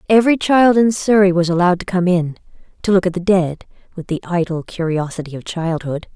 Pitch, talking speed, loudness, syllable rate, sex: 180 Hz, 195 wpm, -17 LUFS, 5.8 syllables/s, female